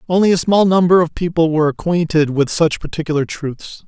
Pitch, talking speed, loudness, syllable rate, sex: 165 Hz, 185 wpm, -16 LUFS, 5.7 syllables/s, male